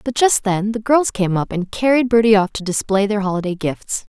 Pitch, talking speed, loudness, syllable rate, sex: 210 Hz, 230 wpm, -17 LUFS, 5.3 syllables/s, female